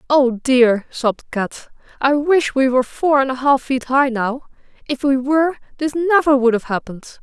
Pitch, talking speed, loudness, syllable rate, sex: 270 Hz, 190 wpm, -17 LUFS, 4.9 syllables/s, female